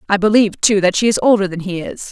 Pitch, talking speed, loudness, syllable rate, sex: 200 Hz, 285 wpm, -15 LUFS, 6.8 syllables/s, female